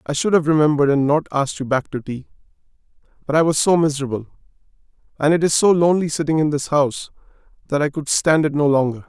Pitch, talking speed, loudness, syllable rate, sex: 150 Hz, 210 wpm, -18 LUFS, 6.7 syllables/s, male